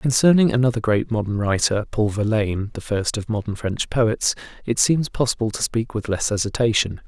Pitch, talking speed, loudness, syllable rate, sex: 110 Hz, 160 wpm, -21 LUFS, 5.3 syllables/s, male